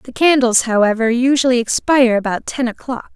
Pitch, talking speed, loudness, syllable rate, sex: 245 Hz, 150 wpm, -15 LUFS, 5.5 syllables/s, female